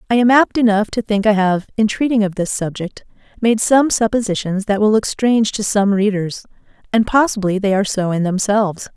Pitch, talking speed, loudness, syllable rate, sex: 210 Hz, 200 wpm, -16 LUFS, 5.5 syllables/s, female